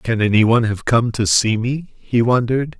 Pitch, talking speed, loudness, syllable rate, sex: 115 Hz, 195 wpm, -17 LUFS, 4.8 syllables/s, male